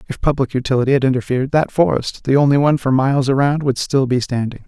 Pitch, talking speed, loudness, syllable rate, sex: 135 Hz, 190 wpm, -17 LUFS, 6.7 syllables/s, male